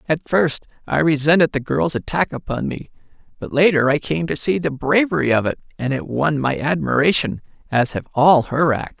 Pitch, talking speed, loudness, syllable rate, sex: 145 Hz, 195 wpm, -19 LUFS, 5.2 syllables/s, male